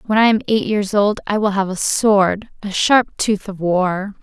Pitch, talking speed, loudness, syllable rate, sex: 200 Hz, 225 wpm, -17 LUFS, 4.2 syllables/s, female